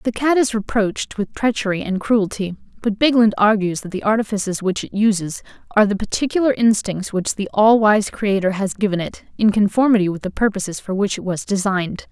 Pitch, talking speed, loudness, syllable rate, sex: 205 Hz, 195 wpm, -19 LUFS, 5.7 syllables/s, female